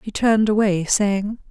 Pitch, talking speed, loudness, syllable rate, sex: 205 Hz, 160 wpm, -19 LUFS, 4.6 syllables/s, female